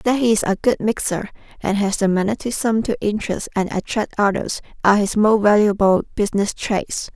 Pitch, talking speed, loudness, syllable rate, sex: 210 Hz, 175 wpm, -19 LUFS, 5.4 syllables/s, female